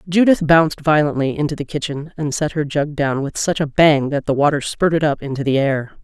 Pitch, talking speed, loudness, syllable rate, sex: 150 Hz, 230 wpm, -18 LUFS, 5.5 syllables/s, female